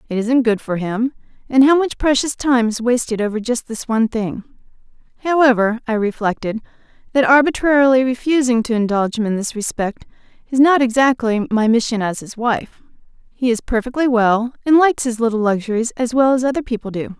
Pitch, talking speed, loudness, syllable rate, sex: 240 Hz, 180 wpm, -17 LUFS, 5.6 syllables/s, female